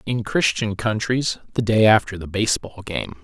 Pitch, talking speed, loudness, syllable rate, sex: 105 Hz, 165 wpm, -21 LUFS, 4.9 syllables/s, male